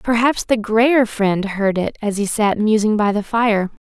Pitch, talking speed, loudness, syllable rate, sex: 215 Hz, 200 wpm, -17 LUFS, 4.2 syllables/s, female